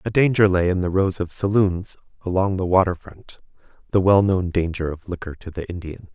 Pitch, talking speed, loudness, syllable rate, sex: 95 Hz, 185 wpm, -21 LUFS, 5.3 syllables/s, male